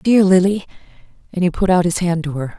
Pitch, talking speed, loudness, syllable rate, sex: 180 Hz, 230 wpm, -16 LUFS, 5.3 syllables/s, female